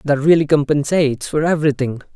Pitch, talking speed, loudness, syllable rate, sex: 145 Hz, 140 wpm, -16 LUFS, 6.1 syllables/s, male